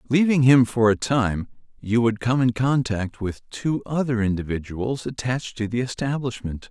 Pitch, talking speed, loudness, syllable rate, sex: 120 Hz, 160 wpm, -22 LUFS, 4.7 syllables/s, male